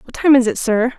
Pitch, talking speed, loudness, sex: 250 Hz, 305 wpm, -15 LUFS, female